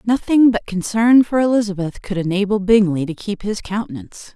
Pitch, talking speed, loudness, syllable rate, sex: 210 Hz, 165 wpm, -17 LUFS, 5.5 syllables/s, female